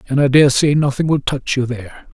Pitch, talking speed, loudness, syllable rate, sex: 135 Hz, 245 wpm, -15 LUFS, 5.8 syllables/s, male